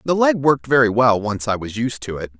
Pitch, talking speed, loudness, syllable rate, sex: 125 Hz, 275 wpm, -18 LUFS, 5.8 syllables/s, male